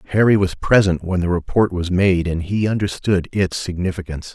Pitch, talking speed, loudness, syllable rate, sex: 90 Hz, 180 wpm, -19 LUFS, 5.5 syllables/s, male